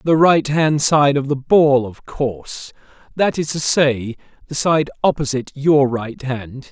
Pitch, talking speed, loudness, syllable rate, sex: 140 Hz, 150 wpm, -17 LUFS, 4.1 syllables/s, male